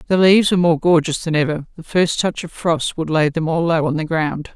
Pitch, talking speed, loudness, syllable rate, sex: 165 Hz, 265 wpm, -17 LUFS, 5.7 syllables/s, female